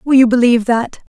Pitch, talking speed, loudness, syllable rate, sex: 240 Hz, 210 wpm, -13 LUFS, 6.3 syllables/s, female